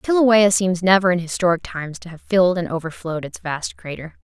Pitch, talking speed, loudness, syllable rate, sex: 180 Hz, 200 wpm, -19 LUFS, 5.8 syllables/s, female